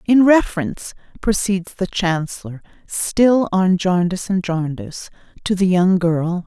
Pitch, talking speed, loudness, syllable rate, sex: 185 Hz, 130 wpm, -18 LUFS, 4.4 syllables/s, female